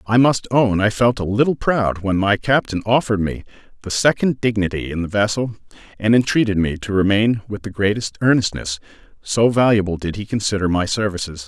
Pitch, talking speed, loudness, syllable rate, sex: 105 Hz, 185 wpm, -18 LUFS, 5.5 syllables/s, male